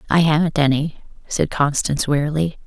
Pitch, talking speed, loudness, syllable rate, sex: 150 Hz, 135 wpm, -19 LUFS, 5.6 syllables/s, female